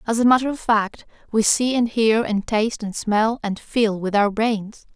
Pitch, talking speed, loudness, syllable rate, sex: 220 Hz, 220 wpm, -20 LUFS, 4.5 syllables/s, female